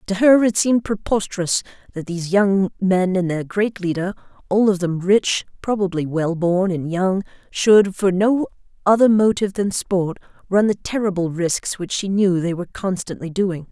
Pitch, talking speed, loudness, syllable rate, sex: 190 Hz, 170 wpm, -19 LUFS, 4.8 syllables/s, female